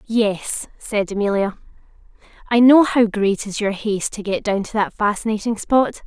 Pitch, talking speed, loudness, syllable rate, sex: 210 Hz, 170 wpm, -19 LUFS, 4.8 syllables/s, female